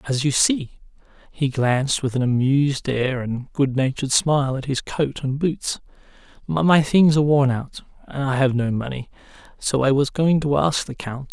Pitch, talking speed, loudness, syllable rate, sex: 135 Hz, 185 wpm, -21 LUFS, 3.6 syllables/s, male